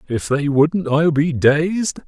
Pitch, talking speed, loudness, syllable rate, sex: 155 Hz, 175 wpm, -17 LUFS, 3.2 syllables/s, male